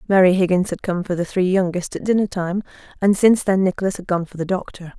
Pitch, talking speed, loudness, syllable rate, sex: 185 Hz, 240 wpm, -19 LUFS, 6.4 syllables/s, female